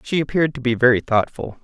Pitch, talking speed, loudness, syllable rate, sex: 125 Hz, 220 wpm, -19 LUFS, 6.5 syllables/s, male